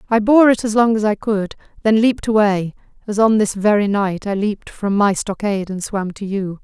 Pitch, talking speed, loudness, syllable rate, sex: 205 Hz, 215 wpm, -17 LUFS, 5.3 syllables/s, female